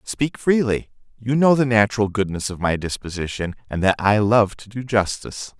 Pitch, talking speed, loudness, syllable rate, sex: 110 Hz, 180 wpm, -20 LUFS, 5.1 syllables/s, male